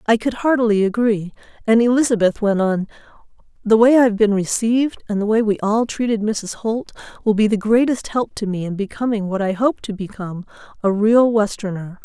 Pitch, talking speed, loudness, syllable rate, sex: 215 Hz, 195 wpm, -18 LUFS, 5.5 syllables/s, female